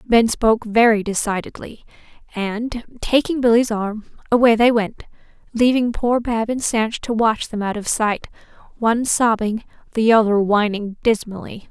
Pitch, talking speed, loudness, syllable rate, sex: 225 Hz, 145 wpm, -18 LUFS, 4.6 syllables/s, female